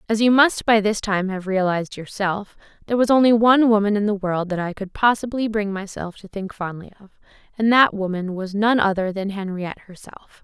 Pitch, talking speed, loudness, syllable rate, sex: 205 Hz, 205 wpm, -20 LUFS, 5.7 syllables/s, female